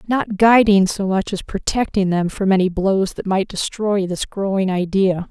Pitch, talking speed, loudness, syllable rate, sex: 195 Hz, 180 wpm, -18 LUFS, 4.5 syllables/s, female